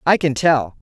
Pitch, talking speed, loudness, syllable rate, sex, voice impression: 155 Hz, 200 wpm, -17 LUFS, 4.4 syllables/s, female, slightly masculine, feminine, very gender-neutral, very adult-like, slightly middle-aged, slightly thin, very tensed, powerful, very bright, slightly hard, very clear, very fluent, cool, intellectual, very refreshing, sincere, slightly calm, very friendly, very reassuring, very unique, elegant, very wild, slightly sweet, very lively, slightly kind, intense, slightly light